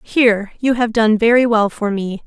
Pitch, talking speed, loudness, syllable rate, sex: 225 Hz, 210 wpm, -15 LUFS, 4.8 syllables/s, female